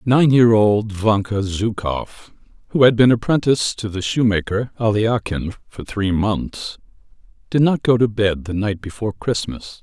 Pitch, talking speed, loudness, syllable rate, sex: 110 Hz, 155 wpm, -18 LUFS, 4.6 syllables/s, male